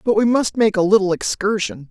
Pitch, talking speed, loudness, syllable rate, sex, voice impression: 205 Hz, 220 wpm, -17 LUFS, 5.5 syllables/s, female, slightly masculine, slightly feminine, very gender-neutral, adult-like, slightly middle-aged, slightly thick, tensed, slightly weak, slightly bright, slightly hard, clear, slightly fluent, slightly raspy, slightly intellectual, slightly refreshing, sincere, slightly calm, slightly friendly, slightly reassuring, very unique, slightly wild, lively, slightly strict, intense, sharp, light